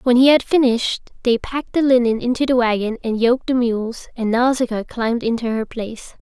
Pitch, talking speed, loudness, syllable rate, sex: 240 Hz, 200 wpm, -18 LUFS, 5.8 syllables/s, female